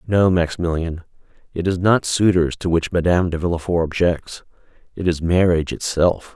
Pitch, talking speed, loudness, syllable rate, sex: 85 Hz, 150 wpm, -19 LUFS, 5.4 syllables/s, male